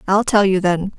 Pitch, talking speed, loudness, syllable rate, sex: 195 Hz, 245 wpm, -16 LUFS, 5.0 syllables/s, female